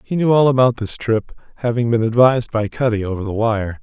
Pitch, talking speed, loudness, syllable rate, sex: 115 Hz, 220 wpm, -17 LUFS, 5.8 syllables/s, male